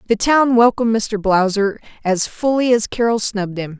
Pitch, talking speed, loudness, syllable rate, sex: 230 Hz, 175 wpm, -17 LUFS, 5.0 syllables/s, female